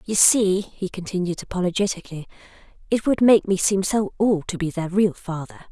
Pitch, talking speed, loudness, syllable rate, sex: 190 Hz, 180 wpm, -21 LUFS, 5.4 syllables/s, female